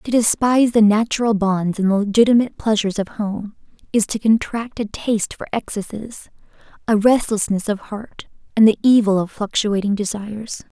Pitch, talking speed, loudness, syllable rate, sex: 215 Hz, 150 wpm, -18 LUFS, 5.2 syllables/s, female